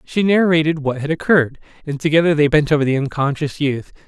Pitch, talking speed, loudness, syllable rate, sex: 150 Hz, 190 wpm, -17 LUFS, 6.1 syllables/s, male